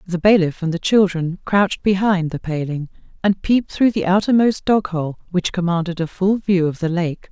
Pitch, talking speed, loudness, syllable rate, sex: 180 Hz, 195 wpm, -18 LUFS, 5.1 syllables/s, female